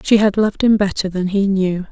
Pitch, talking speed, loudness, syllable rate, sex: 195 Hz, 250 wpm, -16 LUFS, 5.6 syllables/s, female